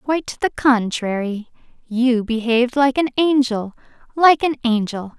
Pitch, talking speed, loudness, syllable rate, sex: 250 Hz, 125 wpm, -18 LUFS, 4.2 syllables/s, female